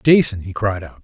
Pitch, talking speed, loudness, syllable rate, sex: 110 Hz, 230 wpm, -18 LUFS, 5.1 syllables/s, male